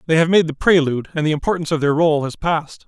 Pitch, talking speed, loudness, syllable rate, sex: 160 Hz, 270 wpm, -18 LUFS, 7.2 syllables/s, male